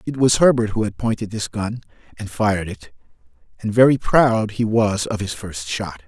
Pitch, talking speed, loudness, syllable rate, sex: 105 Hz, 195 wpm, -19 LUFS, 5.0 syllables/s, male